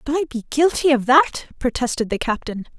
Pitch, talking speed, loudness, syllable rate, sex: 260 Hz, 195 wpm, -19 LUFS, 5.7 syllables/s, female